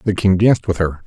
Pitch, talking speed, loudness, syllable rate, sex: 95 Hz, 280 wpm, -16 LUFS, 6.4 syllables/s, male